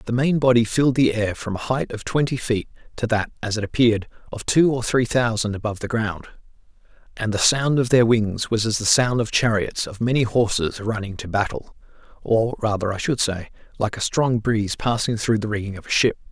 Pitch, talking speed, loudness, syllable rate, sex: 115 Hz, 215 wpm, -21 LUFS, 5.5 syllables/s, male